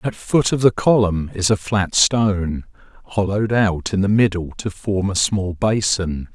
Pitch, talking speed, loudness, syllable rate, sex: 100 Hz, 180 wpm, -19 LUFS, 4.4 syllables/s, male